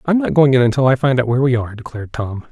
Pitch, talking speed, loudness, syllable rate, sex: 130 Hz, 310 wpm, -15 LUFS, 7.5 syllables/s, male